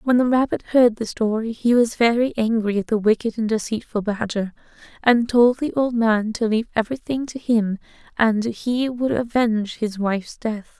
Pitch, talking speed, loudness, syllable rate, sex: 225 Hz, 185 wpm, -21 LUFS, 5.0 syllables/s, female